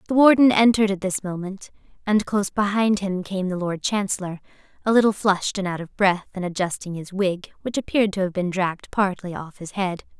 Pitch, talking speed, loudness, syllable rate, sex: 195 Hz, 205 wpm, -22 LUFS, 5.7 syllables/s, female